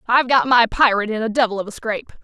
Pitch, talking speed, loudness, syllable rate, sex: 225 Hz, 270 wpm, -18 LUFS, 7.5 syllables/s, female